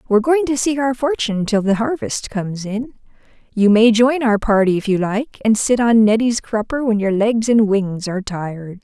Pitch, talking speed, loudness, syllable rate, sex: 220 Hz, 210 wpm, -17 LUFS, 5.1 syllables/s, female